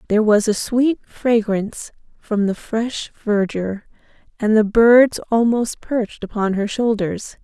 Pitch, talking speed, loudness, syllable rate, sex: 220 Hz, 135 wpm, -18 LUFS, 4.2 syllables/s, female